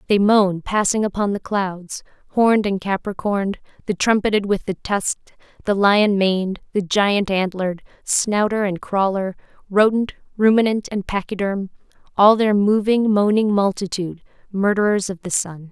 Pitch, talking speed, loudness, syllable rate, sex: 200 Hz, 130 wpm, -19 LUFS, 4.8 syllables/s, female